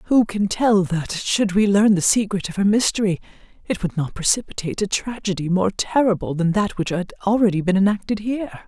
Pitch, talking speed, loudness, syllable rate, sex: 200 Hz, 195 wpm, -20 LUFS, 5.6 syllables/s, female